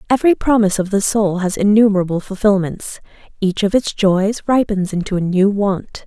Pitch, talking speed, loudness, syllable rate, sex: 200 Hz, 170 wpm, -16 LUFS, 5.3 syllables/s, female